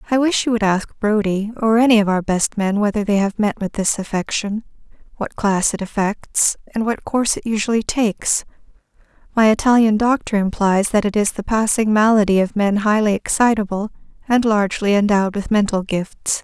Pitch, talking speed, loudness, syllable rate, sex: 210 Hz, 180 wpm, -18 LUFS, 5.3 syllables/s, female